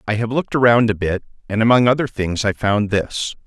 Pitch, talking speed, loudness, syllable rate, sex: 110 Hz, 225 wpm, -18 LUFS, 5.7 syllables/s, male